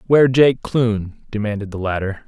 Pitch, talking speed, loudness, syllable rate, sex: 110 Hz, 160 wpm, -18 LUFS, 5.1 syllables/s, male